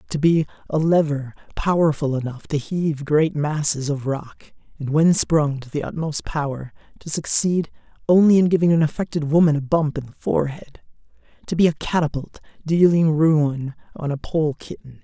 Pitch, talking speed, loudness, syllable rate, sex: 150 Hz, 165 wpm, -20 LUFS, 5.0 syllables/s, male